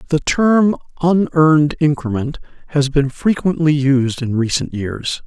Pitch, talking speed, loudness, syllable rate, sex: 150 Hz, 125 wpm, -16 LUFS, 4.2 syllables/s, male